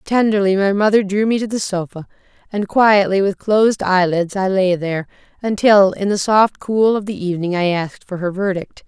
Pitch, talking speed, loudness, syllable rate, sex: 195 Hz, 195 wpm, -17 LUFS, 5.2 syllables/s, female